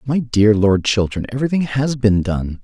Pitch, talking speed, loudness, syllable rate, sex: 115 Hz, 180 wpm, -17 LUFS, 4.9 syllables/s, male